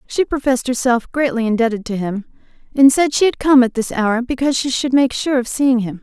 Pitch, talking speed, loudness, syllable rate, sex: 250 Hz, 230 wpm, -16 LUFS, 5.8 syllables/s, female